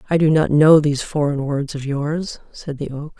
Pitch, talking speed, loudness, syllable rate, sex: 150 Hz, 225 wpm, -18 LUFS, 5.0 syllables/s, female